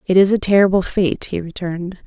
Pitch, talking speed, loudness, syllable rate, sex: 185 Hz, 205 wpm, -17 LUFS, 6.0 syllables/s, female